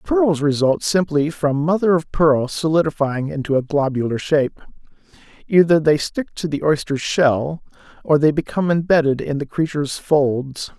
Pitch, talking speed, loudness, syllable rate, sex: 155 Hz, 150 wpm, -18 LUFS, 4.8 syllables/s, male